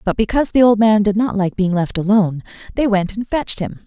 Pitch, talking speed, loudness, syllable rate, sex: 210 Hz, 250 wpm, -16 LUFS, 6.2 syllables/s, female